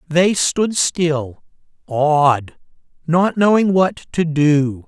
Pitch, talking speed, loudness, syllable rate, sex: 160 Hz, 85 wpm, -16 LUFS, 2.7 syllables/s, male